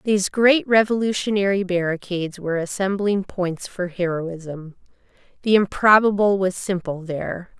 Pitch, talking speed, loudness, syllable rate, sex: 190 Hz, 110 wpm, -21 LUFS, 4.7 syllables/s, female